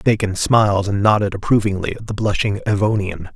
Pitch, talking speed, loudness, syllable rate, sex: 100 Hz, 160 wpm, -18 LUFS, 5.8 syllables/s, male